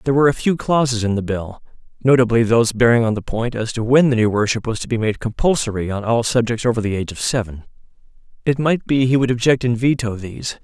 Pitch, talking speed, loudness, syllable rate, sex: 120 Hz, 225 wpm, -18 LUFS, 6.4 syllables/s, male